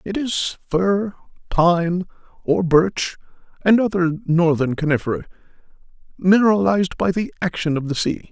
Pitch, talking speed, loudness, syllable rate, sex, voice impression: 175 Hz, 125 wpm, -19 LUFS, 4.7 syllables/s, male, masculine, adult-like, tensed, powerful, clear, intellectual, friendly, lively, slightly sharp